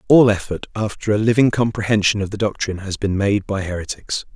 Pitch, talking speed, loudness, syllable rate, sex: 105 Hz, 195 wpm, -19 LUFS, 5.9 syllables/s, male